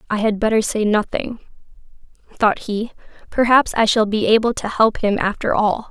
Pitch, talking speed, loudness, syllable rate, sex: 220 Hz, 175 wpm, -18 LUFS, 5.1 syllables/s, female